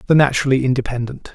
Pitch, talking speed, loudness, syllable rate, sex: 130 Hz, 135 wpm, -17 LUFS, 7.7 syllables/s, male